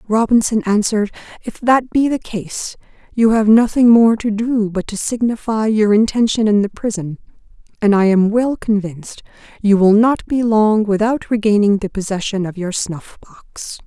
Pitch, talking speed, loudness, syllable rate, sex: 215 Hz, 170 wpm, -15 LUFS, 4.7 syllables/s, female